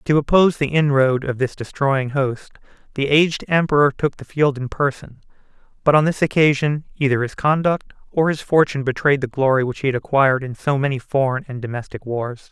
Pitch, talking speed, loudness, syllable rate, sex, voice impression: 140 Hz, 190 wpm, -19 LUFS, 5.7 syllables/s, male, masculine, adult-like, thin, slightly weak, fluent, refreshing, calm, unique, kind, modest